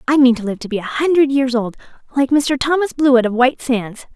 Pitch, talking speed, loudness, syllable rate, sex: 260 Hz, 245 wpm, -16 LUFS, 5.9 syllables/s, female